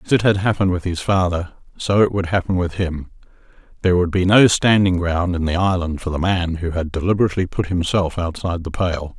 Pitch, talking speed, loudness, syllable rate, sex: 90 Hz, 210 wpm, -19 LUFS, 5.9 syllables/s, male